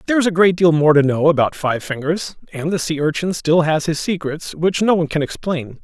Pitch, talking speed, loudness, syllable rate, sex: 160 Hz, 245 wpm, -17 LUFS, 5.6 syllables/s, male